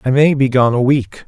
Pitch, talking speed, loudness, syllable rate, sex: 130 Hz, 285 wpm, -14 LUFS, 5.1 syllables/s, male